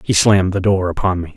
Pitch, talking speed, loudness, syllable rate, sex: 95 Hz, 265 wpm, -16 LUFS, 6.4 syllables/s, male